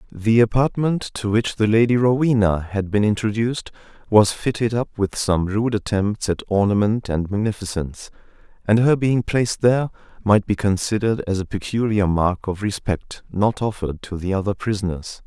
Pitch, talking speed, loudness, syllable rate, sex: 105 Hz, 160 wpm, -20 LUFS, 5.1 syllables/s, male